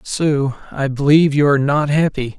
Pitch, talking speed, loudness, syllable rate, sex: 145 Hz, 175 wpm, -16 LUFS, 5.2 syllables/s, male